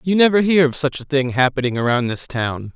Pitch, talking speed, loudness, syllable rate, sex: 140 Hz, 240 wpm, -18 LUFS, 5.7 syllables/s, male